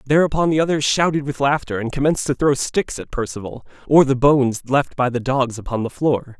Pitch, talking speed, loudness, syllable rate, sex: 135 Hz, 215 wpm, -19 LUFS, 5.7 syllables/s, male